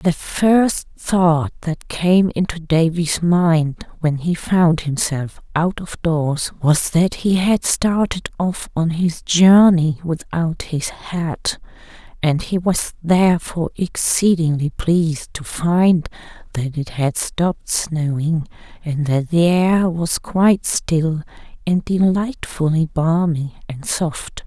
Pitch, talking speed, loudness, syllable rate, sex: 165 Hz, 130 wpm, -18 LUFS, 3.4 syllables/s, female